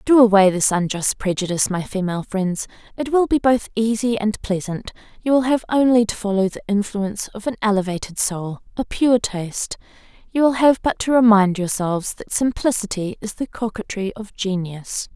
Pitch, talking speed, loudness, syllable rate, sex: 215 Hz, 175 wpm, -20 LUFS, 5.2 syllables/s, female